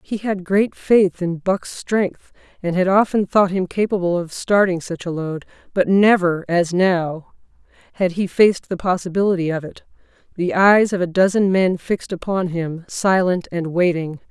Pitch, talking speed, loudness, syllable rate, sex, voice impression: 185 Hz, 170 wpm, -19 LUFS, 4.6 syllables/s, female, very feminine, very adult-like, thin, tensed, slightly powerful, bright, soft, very clear, fluent, cute, intellectual, slightly refreshing, sincere, slightly calm, slightly friendly, reassuring, very unique, slightly elegant, wild, slightly sweet, slightly strict, intense, slightly sharp